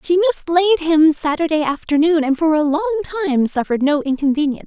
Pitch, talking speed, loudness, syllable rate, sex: 320 Hz, 155 wpm, -17 LUFS, 6.6 syllables/s, female